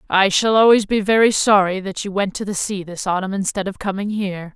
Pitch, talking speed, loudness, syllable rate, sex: 195 Hz, 235 wpm, -18 LUFS, 5.7 syllables/s, female